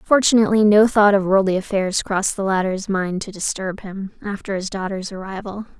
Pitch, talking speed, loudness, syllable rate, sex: 195 Hz, 175 wpm, -19 LUFS, 5.5 syllables/s, female